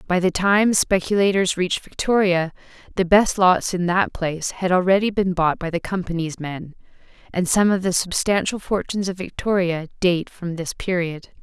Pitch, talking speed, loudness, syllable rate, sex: 180 Hz, 170 wpm, -20 LUFS, 5.0 syllables/s, female